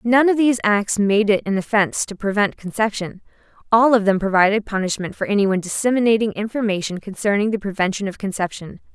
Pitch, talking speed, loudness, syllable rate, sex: 205 Hz, 160 wpm, -19 LUFS, 6.1 syllables/s, female